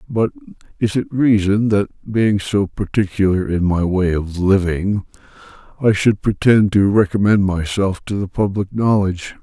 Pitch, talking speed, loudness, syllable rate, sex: 100 Hz, 145 wpm, -17 LUFS, 4.5 syllables/s, male